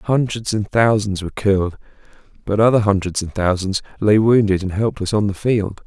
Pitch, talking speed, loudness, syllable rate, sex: 100 Hz, 175 wpm, -18 LUFS, 5.2 syllables/s, male